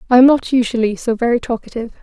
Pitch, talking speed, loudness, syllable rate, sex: 235 Hz, 205 wpm, -15 LUFS, 7.4 syllables/s, female